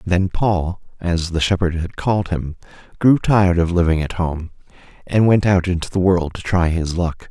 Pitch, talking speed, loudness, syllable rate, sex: 90 Hz, 195 wpm, -18 LUFS, 4.8 syllables/s, male